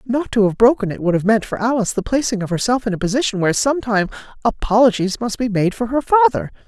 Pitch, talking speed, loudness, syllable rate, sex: 225 Hz, 235 wpm, -18 LUFS, 6.7 syllables/s, female